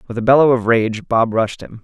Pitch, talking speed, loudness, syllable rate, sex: 115 Hz, 260 wpm, -16 LUFS, 5.4 syllables/s, male